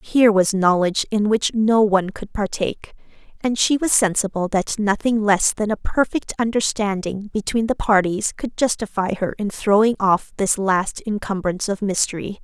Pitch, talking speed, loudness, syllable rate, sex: 205 Hz, 165 wpm, -20 LUFS, 5.0 syllables/s, female